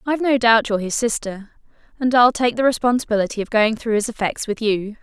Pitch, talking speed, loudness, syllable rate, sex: 225 Hz, 215 wpm, -19 LUFS, 6.0 syllables/s, female